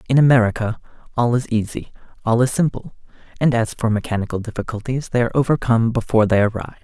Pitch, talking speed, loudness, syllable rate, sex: 115 Hz, 165 wpm, -19 LUFS, 7.0 syllables/s, male